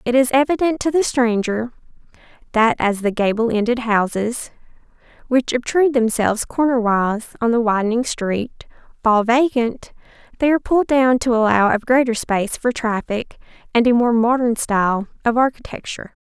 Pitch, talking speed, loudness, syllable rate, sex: 235 Hz, 150 wpm, -18 LUFS, 5.1 syllables/s, female